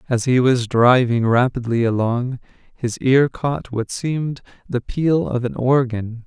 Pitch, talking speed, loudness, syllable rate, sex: 125 Hz, 155 wpm, -19 LUFS, 4.0 syllables/s, male